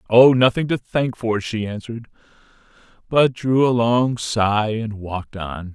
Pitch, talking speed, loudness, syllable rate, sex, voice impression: 115 Hz, 155 wpm, -19 LUFS, 4.2 syllables/s, male, very masculine, very middle-aged, thick, cool, slightly calm, wild